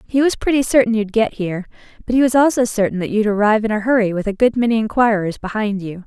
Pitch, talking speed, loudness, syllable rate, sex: 220 Hz, 245 wpm, -17 LUFS, 6.7 syllables/s, female